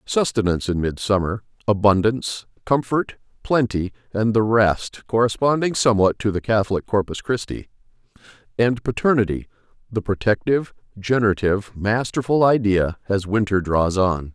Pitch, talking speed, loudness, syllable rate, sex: 105 Hz, 115 wpm, -20 LUFS, 5.2 syllables/s, male